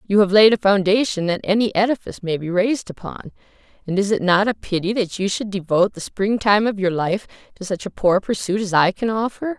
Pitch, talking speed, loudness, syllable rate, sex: 200 Hz, 230 wpm, -19 LUFS, 5.8 syllables/s, female